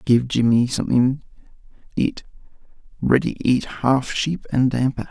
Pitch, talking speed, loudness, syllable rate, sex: 130 Hz, 120 wpm, -20 LUFS, 4.4 syllables/s, male